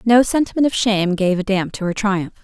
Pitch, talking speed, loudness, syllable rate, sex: 205 Hz, 245 wpm, -18 LUFS, 5.8 syllables/s, female